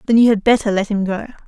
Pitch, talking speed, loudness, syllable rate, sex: 215 Hz, 285 wpm, -16 LUFS, 7.0 syllables/s, female